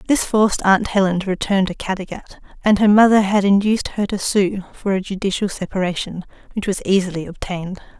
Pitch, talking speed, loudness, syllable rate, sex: 195 Hz, 180 wpm, -18 LUFS, 5.8 syllables/s, female